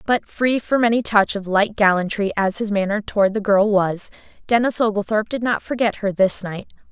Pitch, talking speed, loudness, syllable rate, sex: 210 Hz, 200 wpm, -19 LUFS, 5.4 syllables/s, female